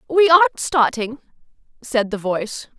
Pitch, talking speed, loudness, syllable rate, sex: 260 Hz, 130 wpm, -18 LUFS, 4.7 syllables/s, female